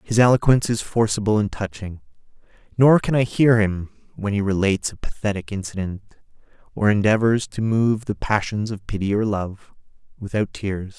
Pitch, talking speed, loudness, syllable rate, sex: 105 Hz, 160 wpm, -21 LUFS, 5.2 syllables/s, male